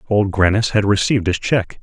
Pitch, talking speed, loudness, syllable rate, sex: 100 Hz, 195 wpm, -17 LUFS, 5.5 syllables/s, male